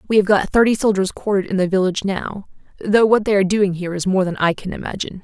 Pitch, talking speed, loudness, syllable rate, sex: 195 Hz, 250 wpm, -18 LUFS, 7.0 syllables/s, female